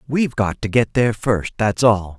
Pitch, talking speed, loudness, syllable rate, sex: 115 Hz, 220 wpm, -18 LUFS, 5.1 syllables/s, male